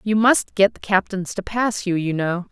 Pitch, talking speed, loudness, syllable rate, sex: 195 Hz, 240 wpm, -20 LUFS, 4.6 syllables/s, female